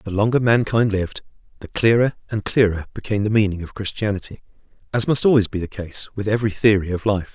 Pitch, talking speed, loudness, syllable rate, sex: 105 Hz, 195 wpm, -20 LUFS, 6.4 syllables/s, male